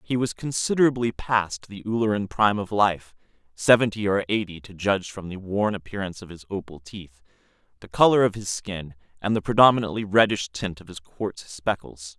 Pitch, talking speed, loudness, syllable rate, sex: 100 Hz, 170 wpm, -24 LUFS, 5.4 syllables/s, male